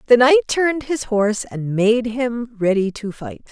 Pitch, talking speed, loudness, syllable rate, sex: 230 Hz, 190 wpm, -18 LUFS, 4.3 syllables/s, female